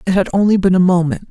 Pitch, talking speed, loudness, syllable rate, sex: 185 Hz, 275 wpm, -14 LUFS, 7.0 syllables/s, female